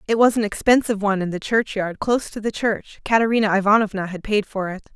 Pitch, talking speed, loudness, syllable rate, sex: 210 Hz, 220 wpm, -20 LUFS, 6.5 syllables/s, female